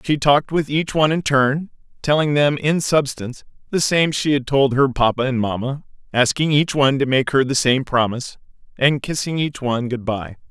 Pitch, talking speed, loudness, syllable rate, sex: 135 Hz, 200 wpm, -19 LUFS, 5.3 syllables/s, male